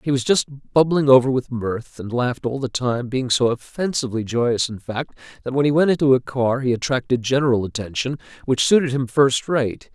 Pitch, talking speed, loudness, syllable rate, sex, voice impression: 130 Hz, 205 wpm, -20 LUFS, 5.3 syllables/s, male, very masculine, very adult-like, slightly thick, slightly tensed, slightly powerful, slightly bright, slightly soft, clear, fluent, cool, very intellectual, very refreshing, sincere, calm, slightly mature, very friendly, very reassuring, unique, elegant, slightly wild, slightly sweet, lively, strict, slightly intense